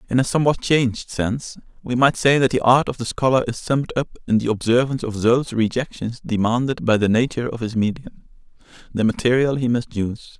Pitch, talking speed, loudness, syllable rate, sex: 120 Hz, 200 wpm, -20 LUFS, 6.1 syllables/s, male